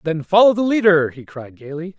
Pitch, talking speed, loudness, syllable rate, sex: 170 Hz, 210 wpm, -15 LUFS, 5.4 syllables/s, male